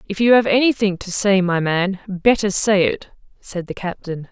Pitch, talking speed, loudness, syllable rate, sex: 195 Hz, 195 wpm, -18 LUFS, 4.8 syllables/s, female